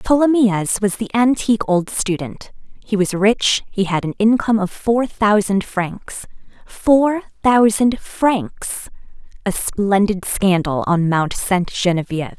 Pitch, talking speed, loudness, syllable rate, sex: 205 Hz, 130 wpm, -17 LUFS, 3.9 syllables/s, female